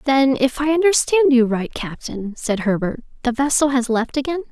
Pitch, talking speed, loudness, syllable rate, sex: 260 Hz, 185 wpm, -19 LUFS, 5.0 syllables/s, female